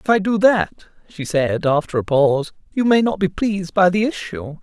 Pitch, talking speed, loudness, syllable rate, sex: 180 Hz, 220 wpm, -18 LUFS, 5.3 syllables/s, male